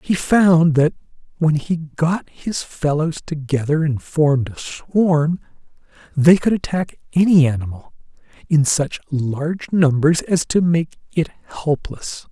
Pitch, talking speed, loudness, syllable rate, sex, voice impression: 155 Hz, 130 wpm, -18 LUFS, 3.9 syllables/s, male, masculine, adult-like, slightly middle-aged, slightly thin, relaxed, weak, slightly dark, soft, slightly clear, fluent, slightly cool, intellectual, slightly refreshing, very sincere, calm, friendly, reassuring, unique, slightly elegant, sweet, slightly lively, very kind, modest